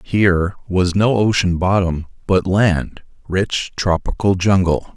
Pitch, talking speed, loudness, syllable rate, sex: 95 Hz, 120 wpm, -17 LUFS, 3.8 syllables/s, male